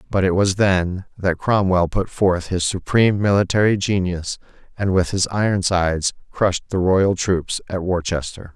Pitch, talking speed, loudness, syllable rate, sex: 95 Hz, 155 wpm, -19 LUFS, 4.9 syllables/s, male